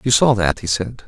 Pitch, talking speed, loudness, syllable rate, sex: 110 Hz, 280 wpm, -17 LUFS, 5.2 syllables/s, male